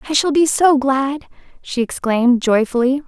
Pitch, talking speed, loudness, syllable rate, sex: 270 Hz, 155 wpm, -16 LUFS, 4.9 syllables/s, female